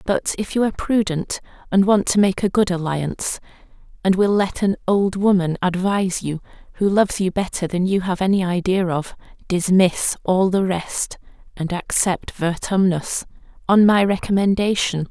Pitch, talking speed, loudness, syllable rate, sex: 190 Hz, 150 wpm, -19 LUFS, 4.8 syllables/s, female